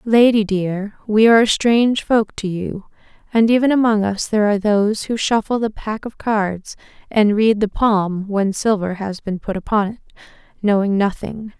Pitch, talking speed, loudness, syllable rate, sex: 210 Hz, 180 wpm, -18 LUFS, 4.8 syllables/s, female